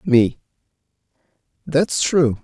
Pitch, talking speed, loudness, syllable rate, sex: 120 Hz, 75 wpm, -18 LUFS, 2.9 syllables/s, male